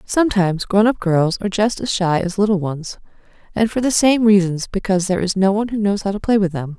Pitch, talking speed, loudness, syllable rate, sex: 195 Hz, 240 wpm, -17 LUFS, 6.2 syllables/s, female